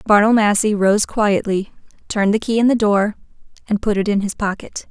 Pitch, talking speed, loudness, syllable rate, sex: 210 Hz, 195 wpm, -17 LUFS, 5.4 syllables/s, female